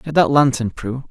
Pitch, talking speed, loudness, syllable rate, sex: 135 Hz, 215 wpm, -17 LUFS, 4.7 syllables/s, male